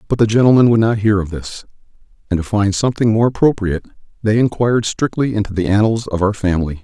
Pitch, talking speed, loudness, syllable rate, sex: 105 Hz, 200 wpm, -16 LUFS, 6.6 syllables/s, male